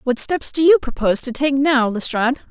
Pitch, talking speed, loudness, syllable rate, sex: 270 Hz, 215 wpm, -17 LUFS, 5.7 syllables/s, female